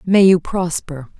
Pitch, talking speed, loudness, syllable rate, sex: 175 Hz, 150 wpm, -16 LUFS, 3.9 syllables/s, female